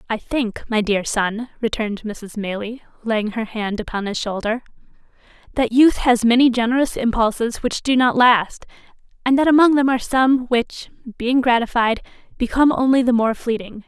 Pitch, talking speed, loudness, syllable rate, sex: 235 Hz, 165 wpm, -19 LUFS, 5.0 syllables/s, female